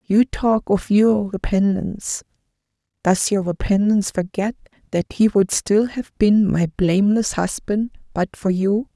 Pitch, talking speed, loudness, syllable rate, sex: 200 Hz, 140 wpm, -19 LUFS, 4.2 syllables/s, female